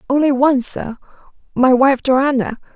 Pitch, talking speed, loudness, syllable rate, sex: 265 Hz, 110 wpm, -15 LUFS, 4.8 syllables/s, female